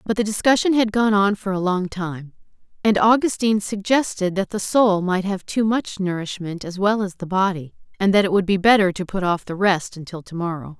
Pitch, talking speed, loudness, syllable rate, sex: 195 Hz, 220 wpm, -20 LUFS, 5.4 syllables/s, female